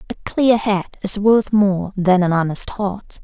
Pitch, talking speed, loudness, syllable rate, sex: 195 Hz, 185 wpm, -17 LUFS, 3.9 syllables/s, female